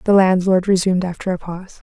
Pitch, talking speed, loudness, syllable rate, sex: 185 Hz, 190 wpm, -17 LUFS, 6.5 syllables/s, female